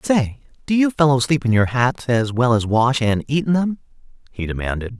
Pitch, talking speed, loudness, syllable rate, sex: 130 Hz, 215 wpm, -19 LUFS, 5.1 syllables/s, male